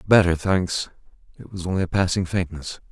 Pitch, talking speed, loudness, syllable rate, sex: 90 Hz, 165 wpm, -23 LUFS, 5.4 syllables/s, male